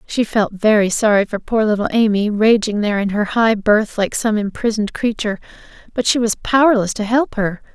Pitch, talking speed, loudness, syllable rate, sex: 215 Hz, 195 wpm, -17 LUFS, 5.5 syllables/s, female